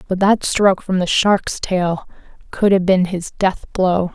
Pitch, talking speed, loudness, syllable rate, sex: 185 Hz, 175 wpm, -17 LUFS, 3.9 syllables/s, female